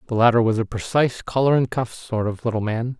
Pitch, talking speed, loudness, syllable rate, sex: 120 Hz, 240 wpm, -21 LUFS, 6.1 syllables/s, male